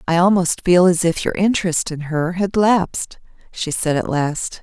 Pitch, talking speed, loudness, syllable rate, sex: 175 Hz, 195 wpm, -18 LUFS, 4.6 syllables/s, female